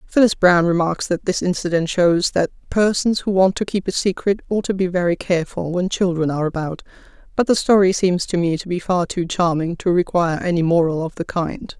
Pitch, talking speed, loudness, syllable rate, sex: 180 Hz, 215 wpm, -19 LUFS, 5.6 syllables/s, female